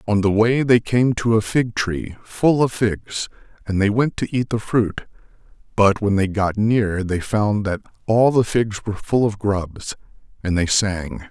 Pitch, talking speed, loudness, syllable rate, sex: 105 Hz, 195 wpm, -20 LUFS, 4.1 syllables/s, male